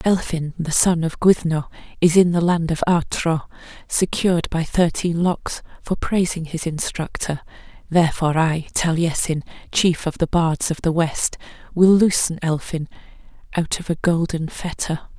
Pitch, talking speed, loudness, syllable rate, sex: 165 Hz, 145 wpm, -20 LUFS, 4.6 syllables/s, female